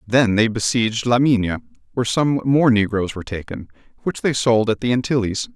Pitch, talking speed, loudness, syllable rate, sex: 115 Hz, 185 wpm, -19 LUFS, 5.6 syllables/s, male